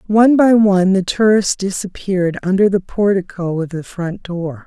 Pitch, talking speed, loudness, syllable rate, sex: 190 Hz, 165 wpm, -16 LUFS, 4.9 syllables/s, female